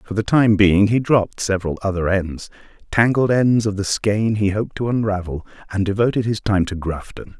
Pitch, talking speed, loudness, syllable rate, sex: 105 Hz, 180 wpm, -19 LUFS, 5.3 syllables/s, male